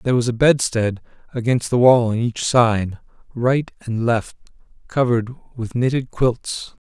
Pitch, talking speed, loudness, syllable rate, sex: 120 Hz, 150 wpm, -19 LUFS, 4.3 syllables/s, male